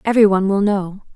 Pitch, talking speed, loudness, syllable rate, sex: 200 Hz, 210 wpm, -16 LUFS, 7.1 syllables/s, female